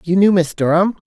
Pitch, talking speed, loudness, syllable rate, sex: 180 Hz, 225 wpm, -15 LUFS, 5.5 syllables/s, female